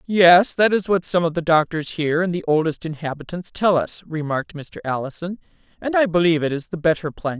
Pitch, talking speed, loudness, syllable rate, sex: 170 Hz, 210 wpm, -20 LUFS, 5.8 syllables/s, female